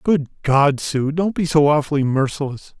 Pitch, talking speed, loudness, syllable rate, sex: 150 Hz, 150 wpm, -18 LUFS, 4.7 syllables/s, male